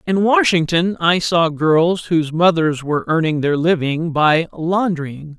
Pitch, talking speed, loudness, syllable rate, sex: 165 Hz, 145 wpm, -16 LUFS, 4.1 syllables/s, male